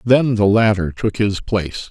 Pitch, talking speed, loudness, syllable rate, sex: 105 Hz, 190 wpm, -17 LUFS, 4.5 syllables/s, male